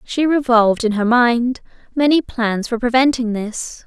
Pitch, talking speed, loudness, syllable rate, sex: 240 Hz, 155 wpm, -16 LUFS, 4.3 syllables/s, female